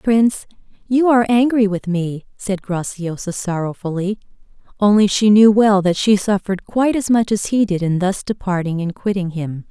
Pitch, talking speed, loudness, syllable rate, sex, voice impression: 200 Hz, 175 wpm, -17 LUFS, 5.0 syllables/s, female, very feminine, very adult-like, thin, tensed, slightly powerful, very bright, very soft, very clear, very fluent, very cute, intellectual, very refreshing, sincere, calm, very friendly, very reassuring, very unique, very elegant, very sweet, very lively, very kind, slightly sharp, slightly modest, light